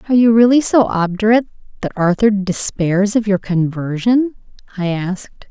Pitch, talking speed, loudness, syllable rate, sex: 205 Hz, 140 wpm, -15 LUFS, 5.3 syllables/s, female